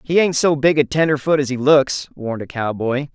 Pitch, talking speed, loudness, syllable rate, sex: 140 Hz, 230 wpm, -18 LUFS, 5.5 syllables/s, male